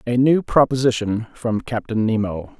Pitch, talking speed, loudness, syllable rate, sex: 115 Hz, 140 wpm, -20 LUFS, 4.6 syllables/s, male